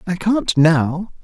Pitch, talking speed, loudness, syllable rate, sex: 175 Hz, 145 wpm, -16 LUFS, 2.9 syllables/s, male